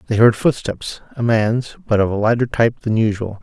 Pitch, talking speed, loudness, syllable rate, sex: 110 Hz, 195 wpm, -18 LUFS, 5.5 syllables/s, male